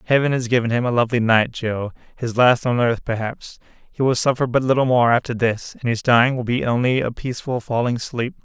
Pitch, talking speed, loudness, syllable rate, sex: 120 Hz, 215 wpm, -19 LUFS, 5.9 syllables/s, male